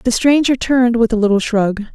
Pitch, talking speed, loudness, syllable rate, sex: 230 Hz, 215 wpm, -14 LUFS, 5.7 syllables/s, female